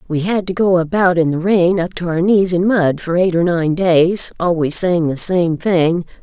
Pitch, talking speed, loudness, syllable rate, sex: 175 Hz, 230 wpm, -15 LUFS, 4.4 syllables/s, female